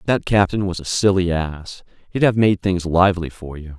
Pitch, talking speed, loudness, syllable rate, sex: 90 Hz, 205 wpm, -18 LUFS, 5.1 syllables/s, male